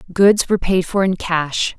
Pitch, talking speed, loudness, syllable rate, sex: 185 Hz, 200 wpm, -17 LUFS, 4.6 syllables/s, female